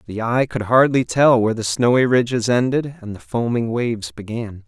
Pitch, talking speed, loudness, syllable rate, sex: 120 Hz, 195 wpm, -18 LUFS, 5.1 syllables/s, male